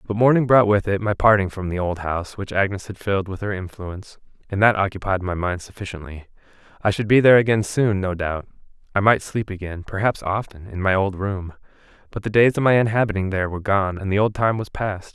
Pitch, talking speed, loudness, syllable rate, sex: 100 Hz, 220 wpm, -21 LUFS, 6.0 syllables/s, male